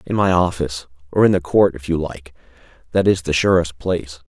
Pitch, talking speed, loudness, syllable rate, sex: 85 Hz, 195 wpm, -18 LUFS, 5.8 syllables/s, male